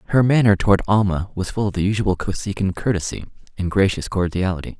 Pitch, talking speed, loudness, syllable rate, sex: 95 Hz, 175 wpm, -20 LUFS, 6.3 syllables/s, male